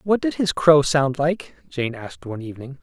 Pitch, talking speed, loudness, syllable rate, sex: 145 Hz, 210 wpm, -20 LUFS, 5.4 syllables/s, male